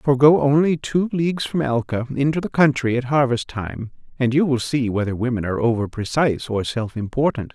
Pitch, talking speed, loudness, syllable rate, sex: 130 Hz, 200 wpm, -20 LUFS, 5.5 syllables/s, male